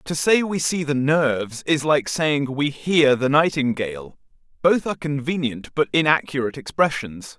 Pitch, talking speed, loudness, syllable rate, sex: 145 Hz, 155 wpm, -21 LUFS, 4.7 syllables/s, male